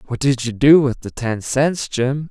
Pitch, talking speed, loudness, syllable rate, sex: 130 Hz, 235 wpm, -17 LUFS, 4.2 syllables/s, male